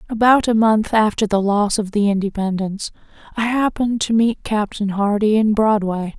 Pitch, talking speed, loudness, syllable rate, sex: 215 Hz, 165 wpm, -18 LUFS, 5.1 syllables/s, female